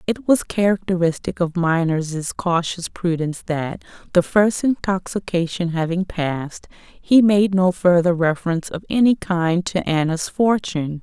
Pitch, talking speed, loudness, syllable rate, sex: 180 Hz, 130 wpm, -20 LUFS, 4.4 syllables/s, female